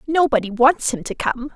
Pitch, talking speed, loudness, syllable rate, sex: 260 Hz, 195 wpm, -19 LUFS, 5.0 syllables/s, female